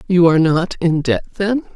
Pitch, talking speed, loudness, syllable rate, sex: 180 Hz, 205 wpm, -16 LUFS, 4.7 syllables/s, female